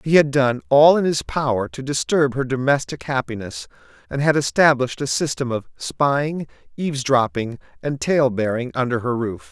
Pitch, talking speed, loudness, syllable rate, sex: 130 Hz, 160 wpm, -20 LUFS, 5.1 syllables/s, male